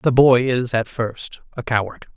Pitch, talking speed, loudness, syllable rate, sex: 120 Hz, 195 wpm, -19 LUFS, 4.3 syllables/s, male